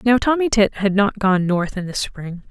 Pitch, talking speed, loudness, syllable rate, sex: 205 Hz, 240 wpm, -19 LUFS, 4.6 syllables/s, female